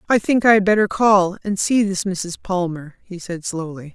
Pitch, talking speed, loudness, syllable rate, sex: 190 Hz, 215 wpm, -18 LUFS, 4.8 syllables/s, female